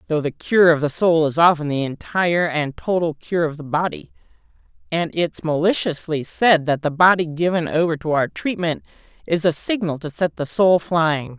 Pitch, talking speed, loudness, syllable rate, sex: 165 Hz, 190 wpm, -19 LUFS, 4.9 syllables/s, female